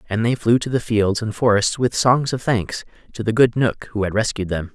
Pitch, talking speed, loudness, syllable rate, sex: 110 Hz, 255 wpm, -19 LUFS, 5.2 syllables/s, male